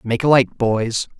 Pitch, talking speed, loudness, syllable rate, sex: 120 Hz, 200 wpm, -17 LUFS, 4.0 syllables/s, male